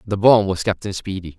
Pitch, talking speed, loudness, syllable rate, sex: 95 Hz, 215 wpm, -19 LUFS, 5.6 syllables/s, male